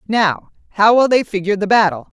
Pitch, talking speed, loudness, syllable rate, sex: 205 Hz, 190 wpm, -15 LUFS, 5.8 syllables/s, female